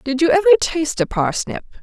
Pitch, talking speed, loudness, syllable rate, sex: 300 Hz, 195 wpm, -17 LUFS, 6.4 syllables/s, female